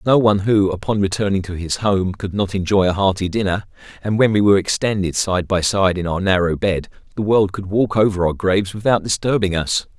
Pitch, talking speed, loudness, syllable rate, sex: 100 Hz, 215 wpm, -18 LUFS, 5.7 syllables/s, male